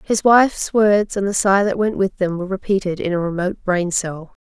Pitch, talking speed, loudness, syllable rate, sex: 195 Hz, 230 wpm, -18 LUFS, 5.5 syllables/s, female